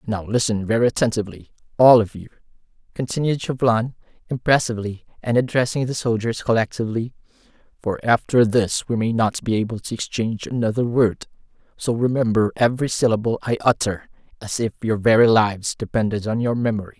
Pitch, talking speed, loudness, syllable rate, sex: 115 Hz, 150 wpm, -20 LUFS, 5.9 syllables/s, male